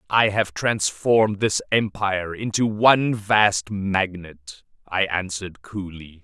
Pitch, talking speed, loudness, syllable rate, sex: 100 Hz, 115 wpm, -21 LUFS, 3.8 syllables/s, male